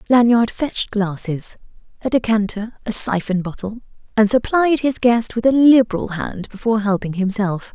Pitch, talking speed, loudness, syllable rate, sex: 220 Hz, 145 wpm, -18 LUFS, 5.0 syllables/s, female